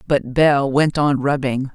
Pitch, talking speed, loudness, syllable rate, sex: 140 Hz, 170 wpm, -17 LUFS, 3.8 syllables/s, female